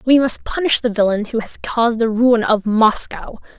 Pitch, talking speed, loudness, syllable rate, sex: 230 Hz, 200 wpm, -16 LUFS, 4.9 syllables/s, female